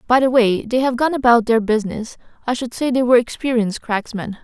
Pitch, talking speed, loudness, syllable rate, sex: 240 Hz, 215 wpm, -18 LUFS, 6.1 syllables/s, female